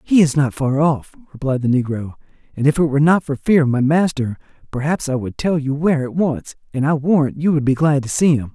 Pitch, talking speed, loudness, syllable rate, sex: 145 Hz, 255 wpm, -18 LUFS, 5.8 syllables/s, male